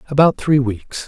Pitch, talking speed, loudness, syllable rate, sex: 135 Hz, 170 wpm, -16 LUFS, 4.6 syllables/s, male